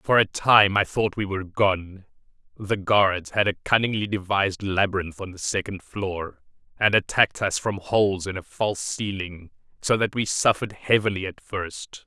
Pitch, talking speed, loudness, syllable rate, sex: 100 Hz, 175 wpm, -23 LUFS, 4.8 syllables/s, male